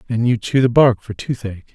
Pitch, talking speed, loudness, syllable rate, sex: 120 Hz, 240 wpm, -17 LUFS, 6.0 syllables/s, male